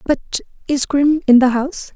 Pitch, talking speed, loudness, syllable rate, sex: 275 Hz, 155 wpm, -16 LUFS, 4.7 syllables/s, female